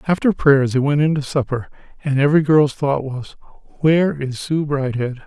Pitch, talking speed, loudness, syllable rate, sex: 140 Hz, 180 wpm, -18 LUFS, 5.4 syllables/s, male